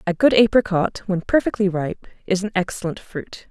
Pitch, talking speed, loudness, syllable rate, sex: 195 Hz, 170 wpm, -20 LUFS, 5.2 syllables/s, female